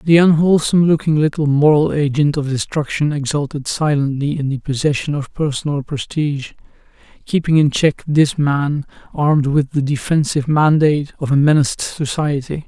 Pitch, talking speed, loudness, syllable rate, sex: 145 Hz, 140 wpm, -16 LUFS, 5.3 syllables/s, male